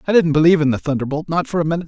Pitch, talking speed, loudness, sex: 160 Hz, 320 wpm, -17 LUFS, male